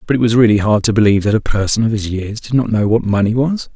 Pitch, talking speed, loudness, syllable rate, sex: 110 Hz, 305 wpm, -15 LUFS, 6.7 syllables/s, male